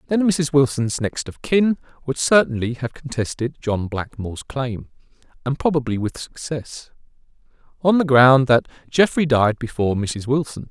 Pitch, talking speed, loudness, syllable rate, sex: 135 Hz, 135 wpm, -20 LUFS, 4.7 syllables/s, male